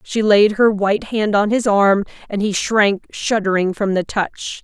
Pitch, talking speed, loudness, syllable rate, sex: 205 Hz, 195 wpm, -17 LUFS, 4.3 syllables/s, female